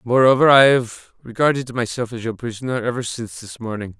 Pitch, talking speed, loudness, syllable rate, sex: 120 Hz, 180 wpm, -18 LUFS, 6.0 syllables/s, male